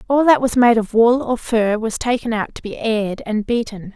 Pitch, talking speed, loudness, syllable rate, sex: 230 Hz, 245 wpm, -18 LUFS, 5.1 syllables/s, female